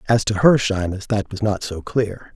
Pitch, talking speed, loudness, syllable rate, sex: 105 Hz, 230 wpm, -20 LUFS, 4.6 syllables/s, male